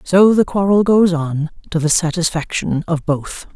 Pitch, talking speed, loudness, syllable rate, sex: 170 Hz, 170 wpm, -16 LUFS, 4.4 syllables/s, female